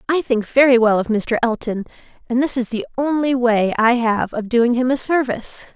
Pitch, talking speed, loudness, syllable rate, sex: 245 Hz, 210 wpm, -18 LUFS, 5.2 syllables/s, female